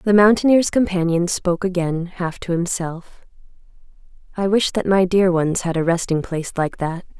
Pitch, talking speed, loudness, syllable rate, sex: 180 Hz, 165 wpm, -19 LUFS, 4.9 syllables/s, female